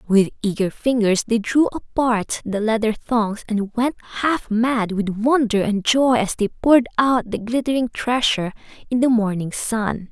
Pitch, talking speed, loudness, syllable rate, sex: 225 Hz, 165 wpm, -20 LUFS, 4.4 syllables/s, female